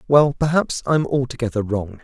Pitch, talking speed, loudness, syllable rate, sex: 130 Hz, 150 wpm, -20 LUFS, 5.0 syllables/s, male